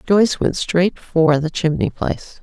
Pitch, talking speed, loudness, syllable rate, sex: 175 Hz, 175 wpm, -18 LUFS, 4.4 syllables/s, female